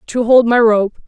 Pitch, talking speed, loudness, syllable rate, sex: 230 Hz, 225 wpm, -12 LUFS, 4.4 syllables/s, female